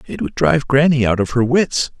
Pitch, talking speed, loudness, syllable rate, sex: 130 Hz, 240 wpm, -16 LUFS, 5.5 syllables/s, male